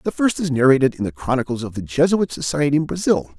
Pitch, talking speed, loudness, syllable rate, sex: 145 Hz, 230 wpm, -19 LUFS, 6.4 syllables/s, male